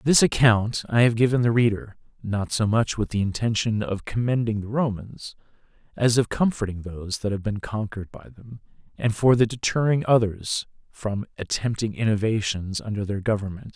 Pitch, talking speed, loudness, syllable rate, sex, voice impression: 110 Hz, 165 wpm, -23 LUFS, 5.2 syllables/s, male, very masculine, very adult-like, very middle-aged, thick, slightly relaxed, slightly weak, slightly dark, soft, clear, fluent, cool, intellectual, slightly refreshing, sincere, calm, mature, friendly, very reassuring, unique, elegant, slightly wild, slightly sweet, kind, slightly modest